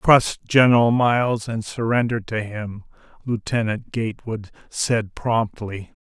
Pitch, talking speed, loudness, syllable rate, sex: 115 Hz, 110 wpm, -21 LUFS, 4.0 syllables/s, male